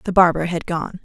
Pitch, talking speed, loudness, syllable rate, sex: 175 Hz, 230 wpm, -19 LUFS, 5.5 syllables/s, female